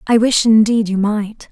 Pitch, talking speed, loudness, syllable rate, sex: 215 Hz, 200 wpm, -14 LUFS, 4.4 syllables/s, female